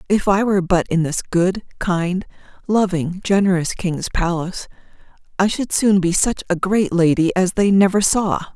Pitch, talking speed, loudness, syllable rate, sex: 185 Hz, 170 wpm, -18 LUFS, 4.7 syllables/s, female